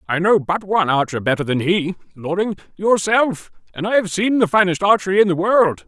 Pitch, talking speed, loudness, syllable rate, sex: 185 Hz, 195 wpm, -18 LUFS, 5.5 syllables/s, male